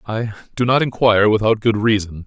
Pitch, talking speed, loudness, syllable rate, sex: 110 Hz, 185 wpm, -17 LUFS, 5.9 syllables/s, male